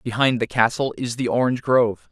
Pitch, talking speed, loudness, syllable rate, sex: 125 Hz, 200 wpm, -21 LUFS, 6.1 syllables/s, male